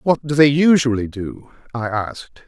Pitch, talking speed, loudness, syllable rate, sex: 130 Hz, 170 wpm, -17 LUFS, 5.0 syllables/s, male